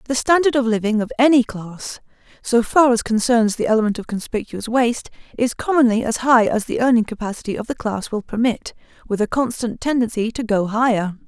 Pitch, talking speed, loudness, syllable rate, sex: 235 Hz, 185 wpm, -19 LUFS, 5.6 syllables/s, female